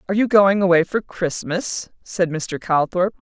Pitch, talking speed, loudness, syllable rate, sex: 185 Hz, 165 wpm, -19 LUFS, 4.5 syllables/s, female